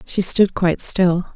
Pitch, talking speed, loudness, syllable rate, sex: 180 Hz, 175 wpm, -18 LUFS, 4.0 syllables/s, female